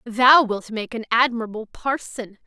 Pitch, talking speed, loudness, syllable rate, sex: 235 Hz, 145 wpm, -20 LUFS, 4.5 syllables/s, female